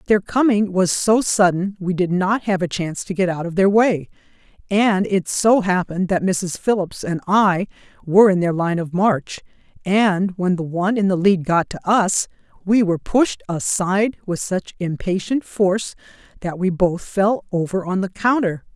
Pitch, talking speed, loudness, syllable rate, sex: 190 Hz, 185 wpm, -19 LUFS, 4.7 syllables/s, female